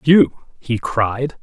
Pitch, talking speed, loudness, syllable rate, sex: 125 Hz, 125 wpm, -18 LUFS, 2.6 syllables/s, male